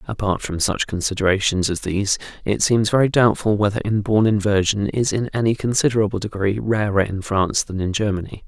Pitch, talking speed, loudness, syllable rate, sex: 105 Hz, 170 wpm, -20 LUFS, 5.9 syllables/s, male